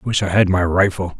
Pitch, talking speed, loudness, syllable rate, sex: 95 Hz, 250 wpm, -17 LUFS, 5.2 syllables/s, male